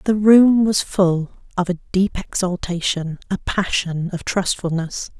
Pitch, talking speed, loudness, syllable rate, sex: 185 Hz, 140 wpm, -19 LUFS, 4.0 syllables/s, female